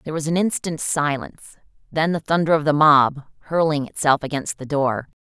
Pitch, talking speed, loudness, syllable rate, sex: 150 Hz, 185 wpm, -20 LUFS, 5.4 syllables/s, female